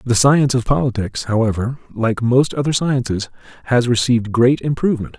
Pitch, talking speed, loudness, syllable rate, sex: 125 Hz, 150 wpm, -17 LUFS, 5.5 syllables/s, male